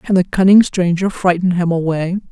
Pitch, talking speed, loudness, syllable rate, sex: 180 Hz, 180 wpm, -14 LUFS, 5.1 syllables/s, female